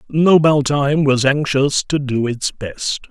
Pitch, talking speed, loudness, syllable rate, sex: 140 Hz, 135 wpm, -16 LUFS, 3.5 syllables/s, male